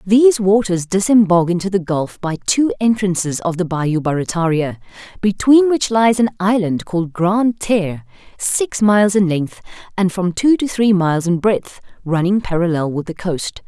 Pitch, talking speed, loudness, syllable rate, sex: 190 Hz, 165 wpm, -16 LUFS, 4.8 syllables/s, female